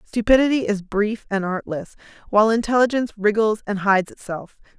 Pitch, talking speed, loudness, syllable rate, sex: 215 Hz, 140 wpm, -20 LUFS, 5.8 syllables/s, female